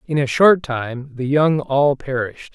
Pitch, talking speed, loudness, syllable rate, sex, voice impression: 140 Hz, 190 wpm, -18 LUFS, 4.2 syllables/s, male, masculine, slightly young, adult-like, thick, tensed, slightly weak, slightly bright, hard, slightly clear, slightly fluent, cool, slightly intellectual, refreshing, sincere, calm, slightly mature, friendly, reassuring, slightly unique, slightly elegant, slightly wild, slightly sweet, kind, very modest